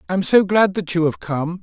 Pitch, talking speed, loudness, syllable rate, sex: 175 Hz, 295 wpm, -18 LUFS, 5.5 syllables/s, male